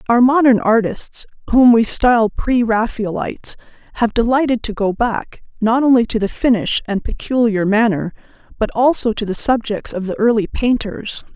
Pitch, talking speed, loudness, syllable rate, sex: 225 Hz, 160 wpm, -16 LUFS, 4.8 syllables/s, female